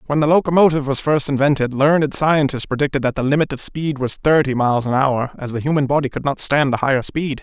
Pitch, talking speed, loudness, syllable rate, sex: 140 Hz, 235 wpm, -17 LUFS, 6.3 syllables/s, male